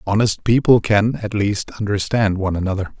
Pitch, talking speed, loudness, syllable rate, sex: 105 Hz, 160 wpm, -18 LUFS, 5.3 syllables/s, male